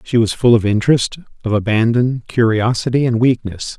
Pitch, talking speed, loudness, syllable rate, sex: 115 Hz, 160 wpm, -16 LUFS, 5.3 syllables/s, male